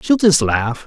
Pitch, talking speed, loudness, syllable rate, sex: 155 Hz, 210 wpm, -15 LUFS, 3.6 syllables/s, male